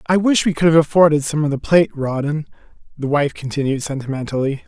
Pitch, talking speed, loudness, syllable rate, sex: 150 Hz, 195 wpm, -18 LUFS, 6.2 syllables/s, male